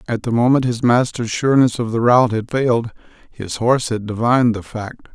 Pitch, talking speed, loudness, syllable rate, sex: 120 Hz, 200 wpm, -17 LUFS, 5.8 syllables/s, male